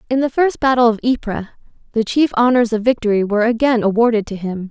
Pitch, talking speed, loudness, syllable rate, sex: 230 Hz, 205 wpm, -16 LUFS, 6.3 syllables/s, female